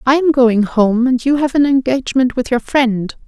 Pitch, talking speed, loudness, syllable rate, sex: 255 Hz, 220 wpm, -14 LUFS, 4.9 syllables/s, female